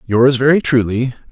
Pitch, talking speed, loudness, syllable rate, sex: 125 Hz, 135 wpm, -14 LUFS, 4.7 syllables/s, male